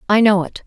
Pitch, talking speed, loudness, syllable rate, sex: 200 Hz, 270 wpm, -15 LUFS, 6.1 syllables/s, female